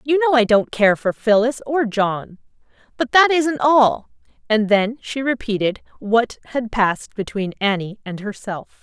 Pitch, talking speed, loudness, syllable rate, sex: 230 Hz, 165 wpm, -19 LUFS, 4.2 syllables/s, female